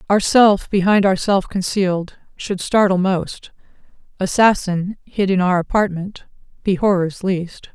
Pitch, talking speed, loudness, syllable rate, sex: 190 Hz, 115 wpm, -17 LUFS, 4.1 syllables/s, female